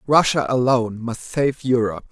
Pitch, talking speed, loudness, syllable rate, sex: 120 Hz, 140 wpm, -20 LUFS, 5.3 syllables/s, male